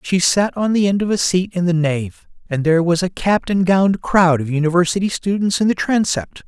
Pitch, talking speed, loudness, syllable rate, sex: 180 Hz, 230 wpm, -17 LUFS, 5.5 syllables/s, male